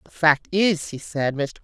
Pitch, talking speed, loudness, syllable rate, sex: 160 Hz, 220 wpm, -22 LUFS, 4.4 syllables/s, female